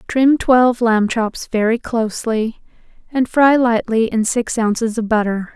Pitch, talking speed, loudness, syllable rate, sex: 230 Hz, 150 wpm, -16 LUFS, 4.3 syllables/s, female